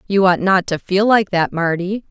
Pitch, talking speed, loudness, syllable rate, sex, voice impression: 190 Hz, 230 wpm, -16 LUFS, 4.8 syllables/s, female, very feminine, slightly young, adult-like, thin, slightly tensed, slightly powerful, bright, hard, very clear, very fluent, cute, slightly cool, intellectual, very refreshing, sincere, calm, friendly, reassuring, unique, elegant, slightly wild, sweet, slightly lively, slightly strict, slightly intense, slightly light